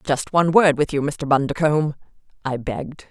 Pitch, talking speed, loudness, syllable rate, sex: 145 Hz, 175 wpm, -20 LUFS, 5.6 syllables/s, female